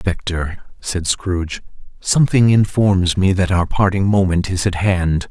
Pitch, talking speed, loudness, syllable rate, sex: 95 Hz, 145 wpm, -17 LUFS, 4.2 syllables/s, male